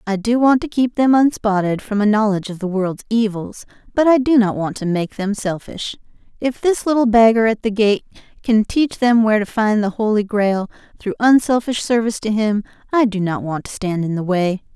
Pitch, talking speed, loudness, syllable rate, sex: 215 Hz, 215 wpm, -17 LUFS, 5.3 syllables/s, female